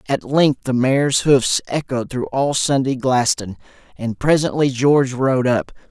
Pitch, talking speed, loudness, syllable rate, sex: 130 Hz, 150 wpm, -18 LUFS, 4.3 syllables/s, male